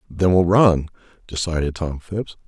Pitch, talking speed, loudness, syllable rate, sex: 85 Hz, 145 wpm, -20 LUFS, 4.4 syllables/s, male